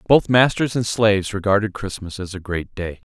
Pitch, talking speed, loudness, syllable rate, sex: 100 Hz, 195 wpm, -20 LUFS, 5.3 syllables/s, male